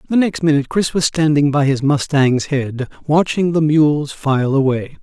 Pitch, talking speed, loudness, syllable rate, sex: 150 Hz, 180 wpm, -16 LUFS, 4.6 syllables/s, male